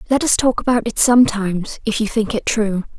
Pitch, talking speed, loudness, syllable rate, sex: 225 Hz, 220 wpm, -17 LUFS, 5.8 syllables/s, female